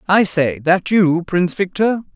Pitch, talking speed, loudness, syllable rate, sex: 185 Hz, 165 wpm, -16 LUFS, 4.3 syllables/s, female